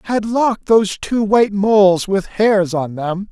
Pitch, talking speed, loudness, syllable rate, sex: 200 Hz, 180 wpm, -15 LUFS, 4.5 syllables/s, male